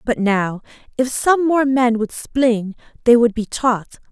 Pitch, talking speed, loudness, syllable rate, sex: 240 Hz, 175 wpm, -17 LUFS, 3.9 syllables/s, female